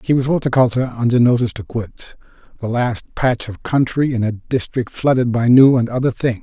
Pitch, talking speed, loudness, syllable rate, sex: 120 Hz, 195 wpm, -17 LUFS, 5.7 syllables/s, male